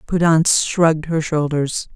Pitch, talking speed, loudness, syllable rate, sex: 160 Hz, 125 wpm, -17 LUFS, 4.5 syllables/s, female